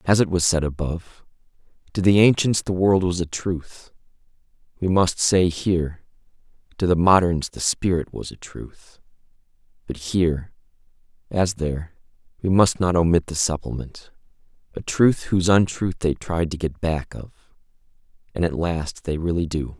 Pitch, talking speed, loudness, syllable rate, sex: 85 Hz, 155 wpm, -21 LUFS, 4.7 syllables/s, male